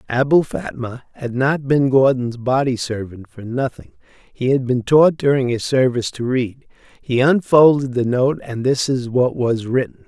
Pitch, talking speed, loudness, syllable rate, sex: 130 Hz, 175 wpm, -18 LUFS, 4.5 syllables/s, male